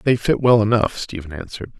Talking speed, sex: 200 wpm, male